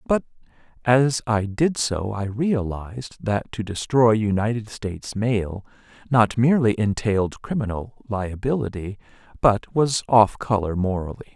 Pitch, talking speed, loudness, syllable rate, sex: 110 Hz, 120 wpm, -22 LUFS, 4.3 syllables/s, male